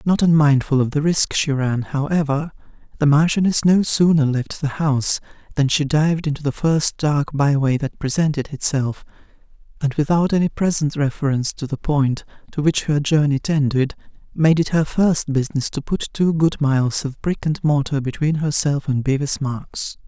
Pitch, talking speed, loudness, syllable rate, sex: 145 Hz, 175 wpm, -19 LUFS, 4.9 syllables/s, male